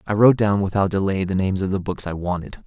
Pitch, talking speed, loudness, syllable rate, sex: 95 Hz, 270 wpm, -21 LUFS, 6.8 syllables/s, male